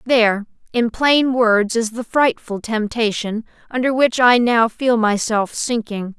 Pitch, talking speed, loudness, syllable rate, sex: 230 Hz, 145 wpm, -17 LUFS, 4.0 syllables/s, female